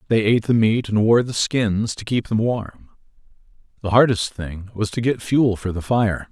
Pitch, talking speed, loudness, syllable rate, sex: 110 Hz, 210 wpm, -20 LUFS, 4.9 syllables/s, male